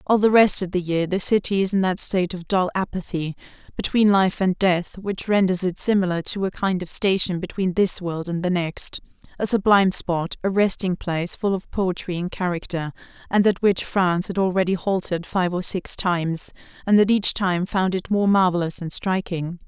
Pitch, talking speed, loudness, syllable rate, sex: 185 Hz, 200 wpm, -22 LUFS, 5.0 syllables/s, female